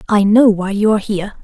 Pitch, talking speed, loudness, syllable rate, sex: 205 Hz, 250 wpm, -14 LUFS, 6.7 syllables/s, female